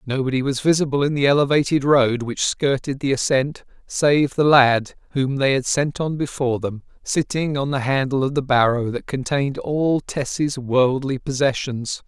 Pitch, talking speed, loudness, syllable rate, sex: 135 Hz, 170 wpm, -20 LUFS, 4.7 syllables/s, male